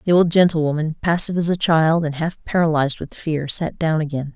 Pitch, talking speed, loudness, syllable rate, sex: 160 Hz, 205 wpm, -19 LUFS, 5.8 syllables/s, female